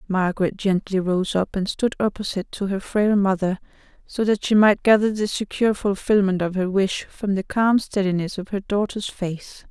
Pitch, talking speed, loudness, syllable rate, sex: 195 Hz, 185 wpm, -21 LUFS, 5.0 syllables/s, female